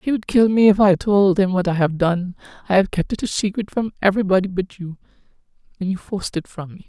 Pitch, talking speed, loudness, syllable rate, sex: 190 Hz, 235 wpm, -19 LUFS, 6.1 syllables/s, female